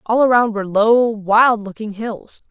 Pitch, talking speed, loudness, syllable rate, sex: 220 Hz, 170 wpm, -16 LUFS, 4.3 syllables/s, female